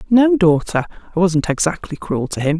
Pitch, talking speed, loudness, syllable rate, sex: 175 Hz, 185 wpm, -17 LUFS, 5.3 syllables/s, female